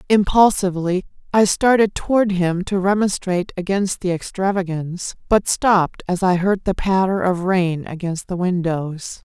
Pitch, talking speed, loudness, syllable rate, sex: 185 Hz, 140 wpm, -19 LUFS, 4.7 syllables/s, female